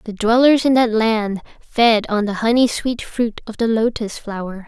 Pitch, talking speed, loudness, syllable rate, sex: 225 Hz, 195 wpm, -17 LUFS, 4.4 syllables/s, female